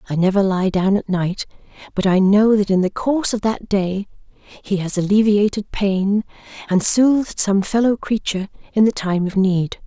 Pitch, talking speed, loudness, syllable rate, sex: 200 Hz, 180 wpm, -18 LUFS, 4.7 syllables/s, female